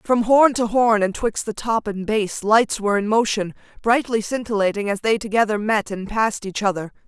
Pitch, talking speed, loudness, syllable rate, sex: 215 Hz, 205 wpm, -20 LUFS, 5.2 syllables/s, female